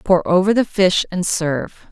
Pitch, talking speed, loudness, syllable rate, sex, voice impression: 185 Hz, 190 wpm, -17 LUFS, 4.6 syllables/s, female, feminine, adult-like, tensed, slightly dark, clear, intellectual, calm, reassuring, slightly kind, slightly modest